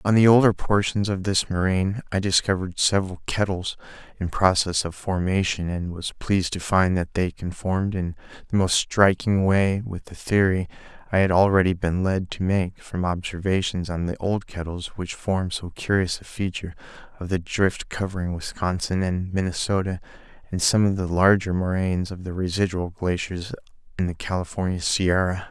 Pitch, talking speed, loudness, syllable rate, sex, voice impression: 95 Hz, 165 wpm, -23 LUFS, 5.1 syllables/s, male, very masculine, slightly middle-aged, thick, slightly relaxed, powerful, slightly dark, soft, slightly muffled, slightly halting, slightly cool, slightly intellectual, very sincere, very calm, slightly mature, slightly friendly, slightly reassuring, very unique, slightly elegant, wild, slightly sweet, very kind, very modest